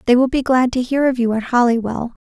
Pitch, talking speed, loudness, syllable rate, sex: 245 Hz, 270 wpm, -17 LUFS, 5.9 syllables/s, female